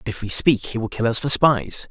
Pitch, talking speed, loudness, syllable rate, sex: 125 Hz, 315 wpm, -19 LUFS, 5.5 syllables/s, male